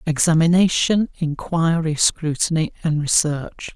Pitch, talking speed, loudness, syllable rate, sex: 160 Hz, 80 wpm, -19 LUFS, 4.1 syllables/s, male